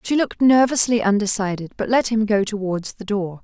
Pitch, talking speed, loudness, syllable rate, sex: 215 Hz, 190 wpm, -19 LUFS, 5.5 syllables/s, female